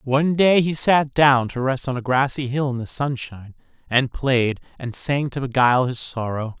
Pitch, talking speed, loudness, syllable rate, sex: 130 Hz, 200 wpm, -20 LUFS, 4.8 syllables/s, male